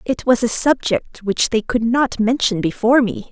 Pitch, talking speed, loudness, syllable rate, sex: 235 Hz, 200 wpm, -17 LUFS, 4.7 syllables/s, female